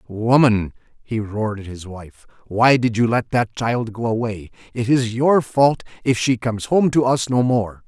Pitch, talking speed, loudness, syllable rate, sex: 115 Hz, 200 wpm, -19 LUFS, 4.4 syllables/s, male